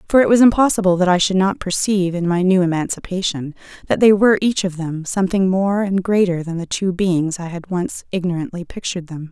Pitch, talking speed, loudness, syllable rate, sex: 185 Hz, 210 wpm, -18 LUFS, 5.9 syllables/s, female